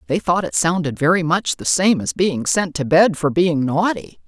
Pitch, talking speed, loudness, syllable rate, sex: 160 Hz, 225 wpm, -18 LUFS, 4.7 syllables/s, female